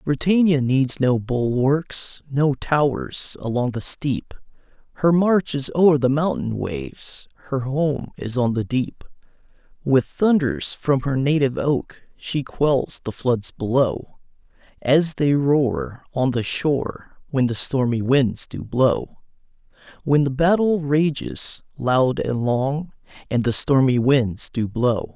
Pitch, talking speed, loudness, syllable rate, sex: 135 Hz, 140 wpm, -21 LUFS, 3.6 syllables/s, male